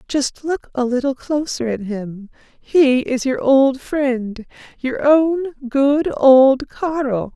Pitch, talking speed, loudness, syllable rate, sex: 270 Hz, 140 wpm, -17 LUFS, 3.1 syllables/s, female